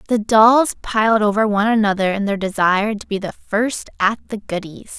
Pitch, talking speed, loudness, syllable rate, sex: 210 Hz, 195 wpm, -17 LUFS, 5.2 syllables/s, female